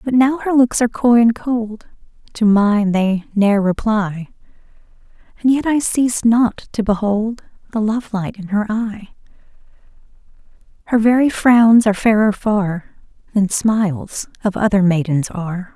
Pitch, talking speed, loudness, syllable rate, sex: 215 Hz, 145 wpm, -16 LUFS, 4.4 syllables/s, female